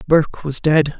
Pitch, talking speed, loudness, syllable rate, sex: 150 Hz, 180 wpm, -17 LUFS, 4.8 syllables/s, female